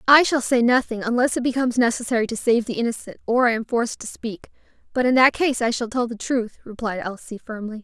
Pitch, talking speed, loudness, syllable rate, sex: 240 Hz, 230 wpm, -21 LUFS, 6.1 syllables/s, female